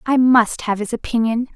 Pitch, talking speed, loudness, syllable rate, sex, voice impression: 235 Hz, 195 wpm, -18 LUFS, 5.1 syllables/s, female, feminine, slightly adult-like, slightly powerful, slightly cute, refreshing, slightly unique